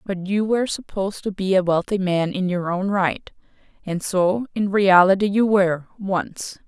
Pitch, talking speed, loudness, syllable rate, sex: 190 Hz, 170 wpm, -20 LUFS, 4.6 syllables/s, female